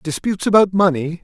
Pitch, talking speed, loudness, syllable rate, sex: 175 Hz, 145 wpm, -16 LUFS, 5.9 syllables/s, male